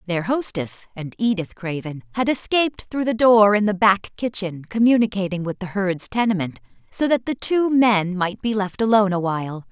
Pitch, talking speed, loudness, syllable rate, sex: 205 Hz, 185 wpm, -20 LUFS, 5.0 syllables/s, female